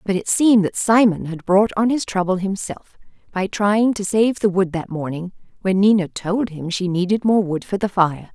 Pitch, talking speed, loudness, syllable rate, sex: 195 Hz, 215 wpm, -19 LUFS, 4.9 syllables/s, female